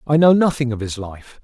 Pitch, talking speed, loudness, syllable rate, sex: 130 Hz, 250 wpm, -17 LUFS, 5.4 syllables/s, male